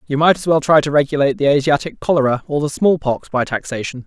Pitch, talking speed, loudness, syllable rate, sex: 145 Hz, 235 wpm, -16 LUFS, 6.4 syllables/s, male